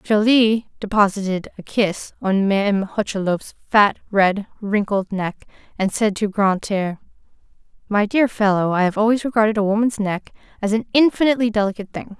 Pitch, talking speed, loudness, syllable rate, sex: 205 Hz, 150 wpm, -19 LUFS, 5.1 syllables/s, female